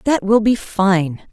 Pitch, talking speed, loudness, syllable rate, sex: 205 Hz, 180 wpm, -16 LUFS, 3.6 syllables/s, female